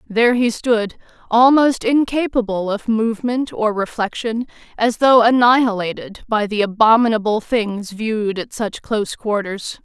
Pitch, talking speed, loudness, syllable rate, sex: 225 Hz, 130 wpm, -17 LUFS, 4.5 syllables/s, female